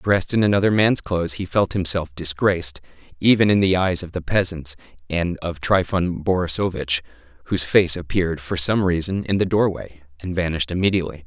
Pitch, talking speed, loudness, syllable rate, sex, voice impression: 90 Hz, 170 wpm, -20 LUFS, 5.7 syllables/s, male, very masculine, very adult-like, thick, sincere, mature, slightly kind